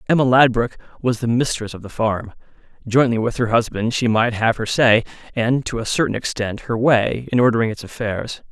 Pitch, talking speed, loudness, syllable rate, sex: 115 Hz, 195 wpm, -19 LUFS, 5.3 syllables/s, male